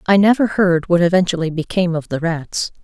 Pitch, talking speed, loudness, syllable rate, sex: 175 Hz, 190 wpm, -17 LUFS, 5.8 syllables/s, female